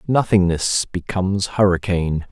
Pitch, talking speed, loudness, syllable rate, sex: 95 Hz, 80 wpm, -19 LUFS, 4.8 syllables/s, male